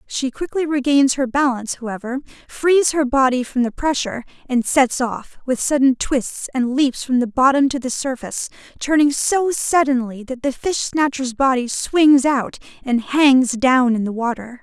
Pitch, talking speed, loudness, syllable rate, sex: 265 Hz, 170 wpm, -18 LUFS, 4.6 syllables/s, female